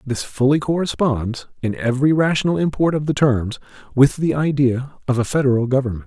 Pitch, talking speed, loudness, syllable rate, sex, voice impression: 135 Hz, 170 wpm, -19 LUFS, 5.6 syllables/s, male, masculine, very adult-like, slightly thick, fluent, cool, slightly intellectual, slightly friendly, slightly kind